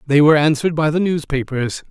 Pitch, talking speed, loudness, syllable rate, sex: 150 Hz, 190 wpm, -17 LUFS, 6.3 syllables/s, male